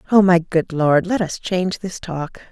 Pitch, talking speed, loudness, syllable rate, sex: 175 Hz, 215 wpm, -19 LUFS, 4.6 syllables/s, female